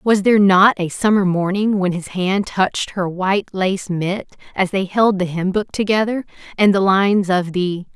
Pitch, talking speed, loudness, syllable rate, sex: 195 Hz, 195 wpm, -17 LUFS, 4.8 syllables/s, female